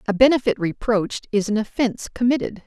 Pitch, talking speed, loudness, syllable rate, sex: 225 Hz, 160 wpm, -21 LUFS, 6.2 syllables/s, female